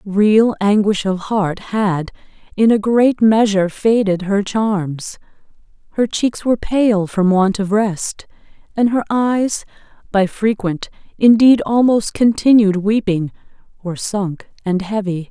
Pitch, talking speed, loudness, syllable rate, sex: 205 Hz, 130 wpm, -16 LUFS, 3.8 syllables/s, female